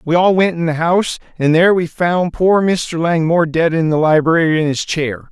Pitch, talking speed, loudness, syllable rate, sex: 165 Hz, 225 wpm, -15 LUFS, 5.2 syllables/s, male